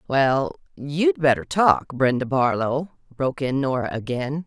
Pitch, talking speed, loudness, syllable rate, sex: 140 Hz, 135 wpm, -22 LUFS, 4.2 syllables/s, female